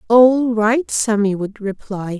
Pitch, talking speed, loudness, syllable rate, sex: 220 Hz, 135 wpm, -17 LUFS, 3.5 syllables/s, female